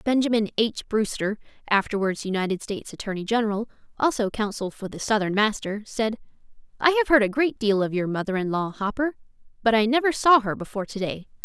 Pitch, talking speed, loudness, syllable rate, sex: 220 Hz, 185 wpm, -24 LUFS, 6.1 syllables/s, female